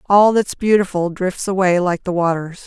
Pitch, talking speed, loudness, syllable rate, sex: 185 Hz, 180 wpm, -17 LUFS, 4.7 syllables/s, female